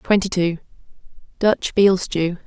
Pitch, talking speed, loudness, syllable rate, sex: 185 Hz, 95 wpm, -19 LUFS, 4.1 syllables/s, female